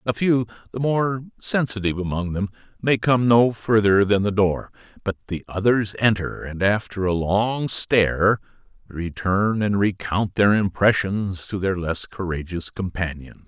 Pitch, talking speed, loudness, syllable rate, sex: 100 Hz, 145 wpm, -22 LUFS, 4.3 syllables/s, male